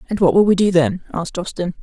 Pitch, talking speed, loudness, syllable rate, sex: 185 Hz, 260 wpm, -17 LUFS, 6.7 syllables/s, female